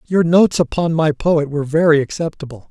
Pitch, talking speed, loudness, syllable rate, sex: 155 Hz, 175 wpm, -16 LUFS, 5.9 syllables/s, male